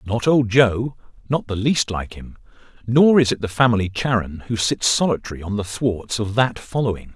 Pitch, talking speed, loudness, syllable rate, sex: 110 Hz, 195 wpm, -20 LUFS, 5.0 syllables/s, male